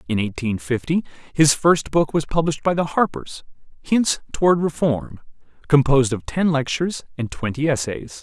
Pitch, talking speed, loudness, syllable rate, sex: 145 Hz, 155 wpm, -20 LUFS, 5.1 syllables/s, male